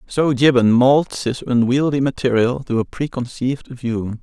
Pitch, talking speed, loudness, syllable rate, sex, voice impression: 125 Hz, 140 wpm, -18 LUFS, 4.4 syllables/s, male, masculine, adult-like, slightly soft, slightly fluent, slightly calm, friendly, slightly reassuring, kind